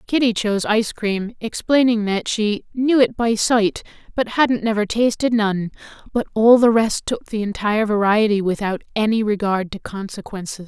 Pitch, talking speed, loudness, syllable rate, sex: 215 Hz, 165 wpm, -19 LUFS, 4.8 syllables/s, female